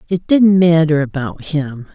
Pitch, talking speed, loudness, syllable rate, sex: 160 Hz, 155 wpm, -14 LUFS, 4.1 syllables/s, female